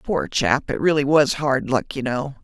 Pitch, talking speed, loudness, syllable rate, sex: 140 Hz, 195 wpm, -20 LUFS, 4.4 syllables/s, female